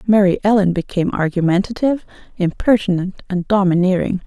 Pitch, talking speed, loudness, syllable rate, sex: 190 Hz, 100 wpm, -17 LUFS, 5.9 syllables/s, female